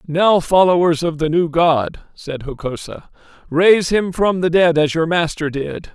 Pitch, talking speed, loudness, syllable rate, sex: 165 Hz, 170 wpm, -16 LUFS, 4.3 syllables/s, male